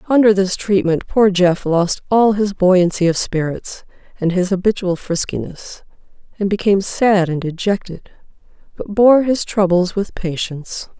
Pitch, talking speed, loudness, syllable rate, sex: 190 Hz, 140 wpm, -16 LUFS, 4.5 syllables/s, female